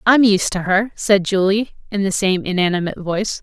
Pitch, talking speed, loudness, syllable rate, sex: 195 Hz, 195 wpm, -17 LUFS, 5.4 syllables/s, female